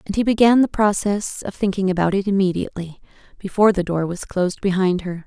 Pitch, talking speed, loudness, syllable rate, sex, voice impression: 190 Hz, 180 wpm, -19 LUFS, 6.2 syllables/s, female, feminine, adult-like, tensed, fluent, intellectual, calm, slightly reassuring, elegant, slightly strict, slightly sharp